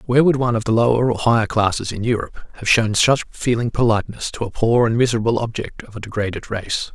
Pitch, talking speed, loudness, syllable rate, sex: 115 Hz, 225 wpm, -19 LUFS, 6.4 syllables/s, male